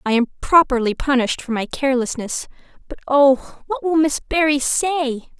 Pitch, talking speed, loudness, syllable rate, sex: 275 Hz, 155 wpm, -18 LUFS, 5.1 syllables/s, female